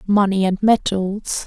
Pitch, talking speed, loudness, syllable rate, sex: 200 Hz, 125 wpm, -18 LUFS, 3.9 syllables/s, female